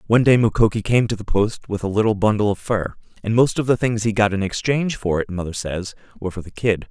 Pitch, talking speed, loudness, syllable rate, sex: 105 Hz, 260 wpm, -20 LUFS, 6.3 syllables/s, male